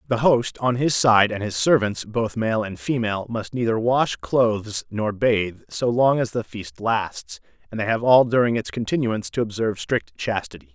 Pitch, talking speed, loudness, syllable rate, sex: 110 Hz, 195 wpm, -22 LUFS, 4.8 syllables/s, male